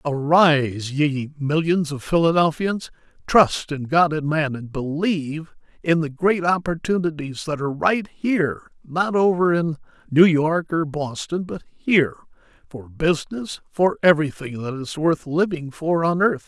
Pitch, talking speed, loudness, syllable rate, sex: 160 Hz, 140 wpm, -21 LUFS, 4.4 syllables/s, male